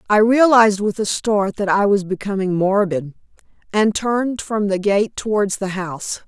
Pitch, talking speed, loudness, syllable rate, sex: 205 Hz, 170 wpm, -18 LUFS, 4.8 syllables/s, female